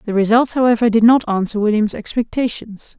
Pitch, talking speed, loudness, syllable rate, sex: 225 Hz, 160 wpm, -16 LUFS, 5.6 syllables/s, female